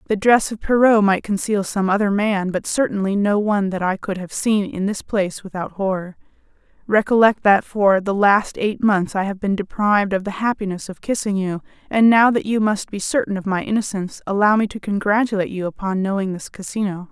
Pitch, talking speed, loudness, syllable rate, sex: 200 Hz, 205 wpm, -19 LUFS, 5.5 syllables/s, female